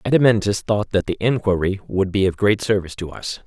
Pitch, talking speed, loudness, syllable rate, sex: 100 Hz, 210 wpm, -20 LUFS, 5.7 syllables/s, male